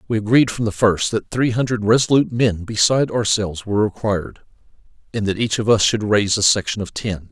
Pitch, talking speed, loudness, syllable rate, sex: 110 Hz, 205 wpm, -18 LUFS, 6.1 syllables/s, male